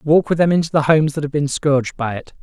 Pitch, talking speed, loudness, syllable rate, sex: 150 Hz, 295 wpm, -17 LUFS, 6.4 syllables/s, male